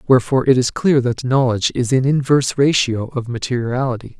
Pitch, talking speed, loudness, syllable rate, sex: 130 Hz, 170 wpm, -17 LUFS, 6.0 syllables/s, male